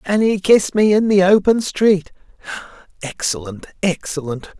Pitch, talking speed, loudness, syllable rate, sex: 185 Hz, 120 wpm, -16 LUFS, 5.9 syllables/s, male